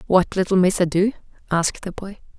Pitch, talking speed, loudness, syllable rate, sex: 185 Hz, 175 wpm, -20 LUFS, 5.9 syllables/s, female